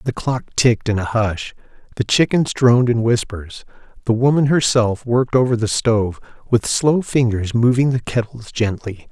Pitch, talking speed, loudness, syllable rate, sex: 115 Hz, 165 wpm, -17 LUFS, 4.9 syllables/s, male